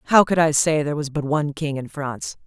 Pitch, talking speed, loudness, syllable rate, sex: 150 Hz, 270 wpm, -21 LUFS, 6.4 syllables/s, female